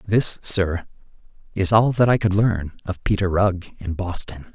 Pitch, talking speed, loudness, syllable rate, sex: 95 Hz, 170 wpm, -21 LUFS, 4.3 syllables/s, male